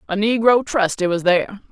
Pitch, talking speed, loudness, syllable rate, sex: 205 Hz, 175 wpm, -18 LUFS, 5.5 syllables/s, female